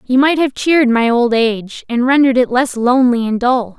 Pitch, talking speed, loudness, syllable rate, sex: 250 Hz, 220 wpm, -13 LUFS, 5.5 syllables/s, female